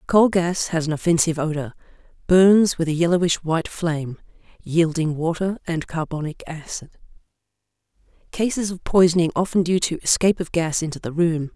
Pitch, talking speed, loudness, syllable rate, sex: 170 Hz, 150 wpm, -21 LUFS, 5.4 syllables/s, female